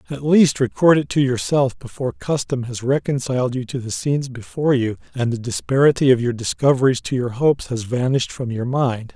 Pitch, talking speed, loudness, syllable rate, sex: 130 Hz, 195 wpm, -19 LUFS, 5.7 syllables/s, male